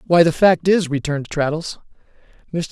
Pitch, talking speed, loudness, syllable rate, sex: 160 Hz, 155 wpm, -18 LUFS, 3.5 syllables/s, male